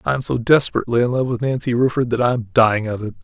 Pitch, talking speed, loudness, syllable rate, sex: 120 Hz, 280 wpm, -18 LUFS, 7.2 syllables/s, male